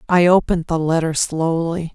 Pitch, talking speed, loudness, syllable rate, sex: 165 Hz, 155 wpm, -18 LUFS, 5.1 syllables/s, female